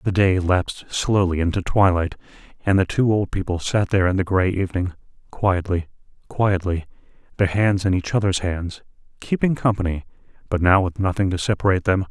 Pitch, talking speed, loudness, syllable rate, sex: 95 Hz, 170 wpm, -21 LUFS, 5.5 syllables/s, male